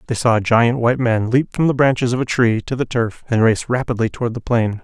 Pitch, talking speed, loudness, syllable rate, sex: 120 Hz, 275 wpm, -17 LUFS, 6.2 syllables/s, male